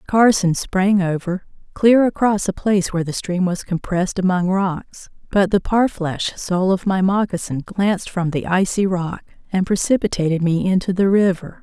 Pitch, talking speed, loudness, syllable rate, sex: 190 Hz, 165 wpm, -19 LUFS, 4.9 syllables/s, female